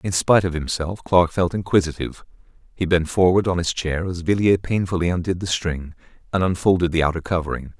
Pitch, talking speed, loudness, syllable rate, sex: 90 Hz, 185 wpm, -21 LUFS, 6.0 syllables/s, male